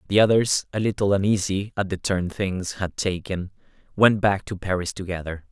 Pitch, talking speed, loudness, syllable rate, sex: 95 Hz, 175 wpm, -23 LUFS, 5.1 syllables/s, male